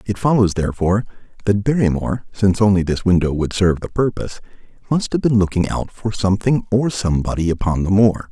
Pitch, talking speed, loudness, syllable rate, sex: 100 Hz, 180 wpm, -18 LUFS, 6.3 syllables/s, male